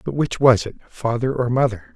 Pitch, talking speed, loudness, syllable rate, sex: 120 Hz, 215 wpm, -20 LUFS, 5.2 syllables/s, male